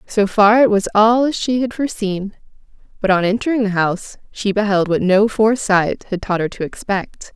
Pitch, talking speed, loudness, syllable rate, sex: 210 Hz, 195 wpm, -17 LUFS, 5.2 syllables/s, female